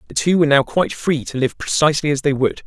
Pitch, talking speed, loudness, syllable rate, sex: 145 Hz, 270 wpm, -17 LUFS, 7.0 syllables/s, male